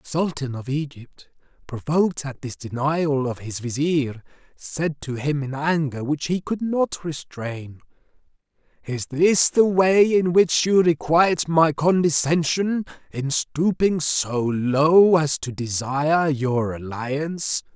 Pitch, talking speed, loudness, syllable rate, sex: 150 Hz, 135 wpm, -21 LUFS, 3.7 syllables/s, male